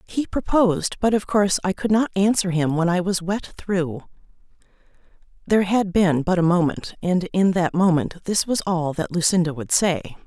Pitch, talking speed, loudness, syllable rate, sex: 185 Hz, 185 wpm, -21 LUFS, 4.9 syllables/s, female